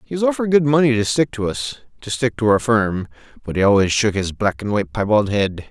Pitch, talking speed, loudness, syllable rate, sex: 110 Hz, 230 wpm, -18 LUFS, 6.0 syllables/s, male